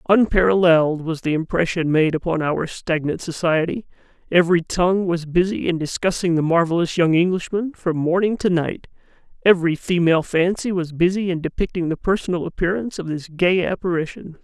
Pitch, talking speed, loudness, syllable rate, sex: 170 Hz, 155 wpm, -20 LUFS, 5.6 syllables/s, male